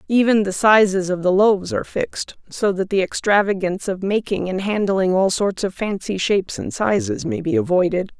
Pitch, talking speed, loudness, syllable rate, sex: 195 Hz, 190 wpm, -19 LUFS, 5.4 syllables/s, female